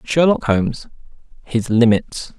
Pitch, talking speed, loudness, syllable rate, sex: 120 Hz, 75 wpm, -17 LUFS, 4.0 syllables/s, male